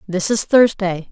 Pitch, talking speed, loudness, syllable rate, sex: 200 Hz, 160 wpm, -16 LUFS, 4.2 syllables/s, female